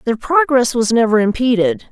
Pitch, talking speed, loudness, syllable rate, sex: 235 Hz, 155 wpm, -14 LUFS, 5.1 syllables/s, female